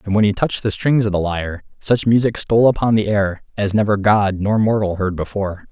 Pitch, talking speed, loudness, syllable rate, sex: 105 Hz, 230 wpm, -17 LUFS, 5.8 syllables/s, male